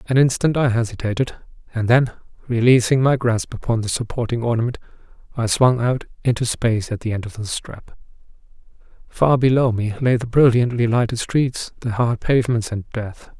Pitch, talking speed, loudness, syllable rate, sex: 120 Hz, 165 wpm, -19 LUFS, 5.4 syllables/s, male